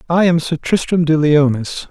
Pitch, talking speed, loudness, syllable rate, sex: 160 Hz, 190 wpm, -15 LUFS, 4.6 syllables/s, male